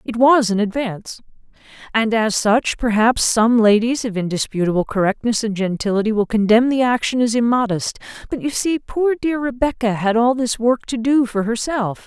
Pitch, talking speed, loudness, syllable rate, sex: 230 Hz, 175 wpm, -18 LUFS, 5.0 syllables/s, female